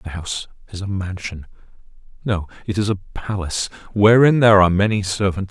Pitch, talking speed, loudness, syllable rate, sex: 100 Hz, 165 wpm, -18 LUFS, 5.8 syllables/s, male